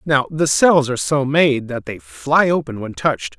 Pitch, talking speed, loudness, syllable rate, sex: 135 Hz, 215 wpm, -17 LUFS, 4.6 syllables/s, male